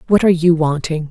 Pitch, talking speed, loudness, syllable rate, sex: 165 Hz, 220 wpm, -15 LUFS, 6.6 syllables/s, female